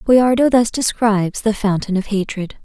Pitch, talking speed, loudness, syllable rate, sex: 215 Hz, 160 wpm, -17 LUFS, 4.9 syllables/s, female